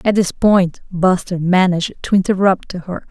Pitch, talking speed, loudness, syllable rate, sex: 185 Hz, 155 wpm, -16 LUFS, 4.6 syllables/s, female